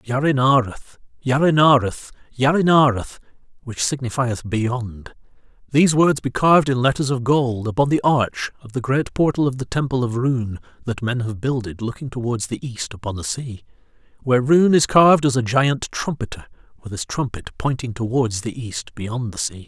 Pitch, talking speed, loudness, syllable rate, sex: 125 Hz, 165 wpm, -20 LUFS, 5.2 syllables/s, male